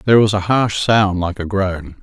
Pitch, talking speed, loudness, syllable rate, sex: 100 Hz, 235 wpm, -16 LUFS, 4.9 syllables/s, male